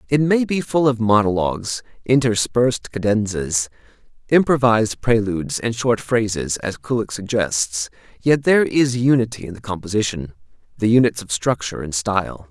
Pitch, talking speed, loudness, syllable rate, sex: 110 Hz, 140 wpm, -19 LUFS, 5.1 syllables/s, male